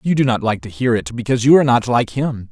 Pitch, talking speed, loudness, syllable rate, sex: 120 Hz, 310 wpm, -16 LUFS, 6.6 syllables/s, male